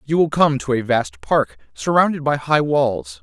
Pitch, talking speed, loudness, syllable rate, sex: 150 Hz, 205 wpm, -19 LUFS, 4.4 syllables/s, male